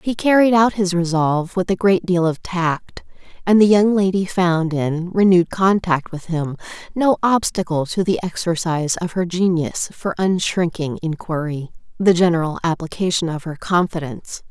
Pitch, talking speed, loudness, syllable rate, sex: 175 Hz, 155 wpm, -18 LUFS, 4.8 syllables/s, female